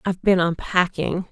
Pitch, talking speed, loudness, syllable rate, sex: 180 Hz, 135 wpm, -21 LUFS, 5.0 syllables/s, female